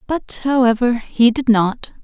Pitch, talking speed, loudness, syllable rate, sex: 240 Hz, 150 wpm, -16 LUFS, 4.0 syllables/s, female